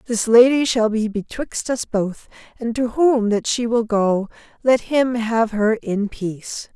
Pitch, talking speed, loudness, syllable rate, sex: 225 Hz, 180 wpm, -19 LUFS, 3.9 syllables/s, female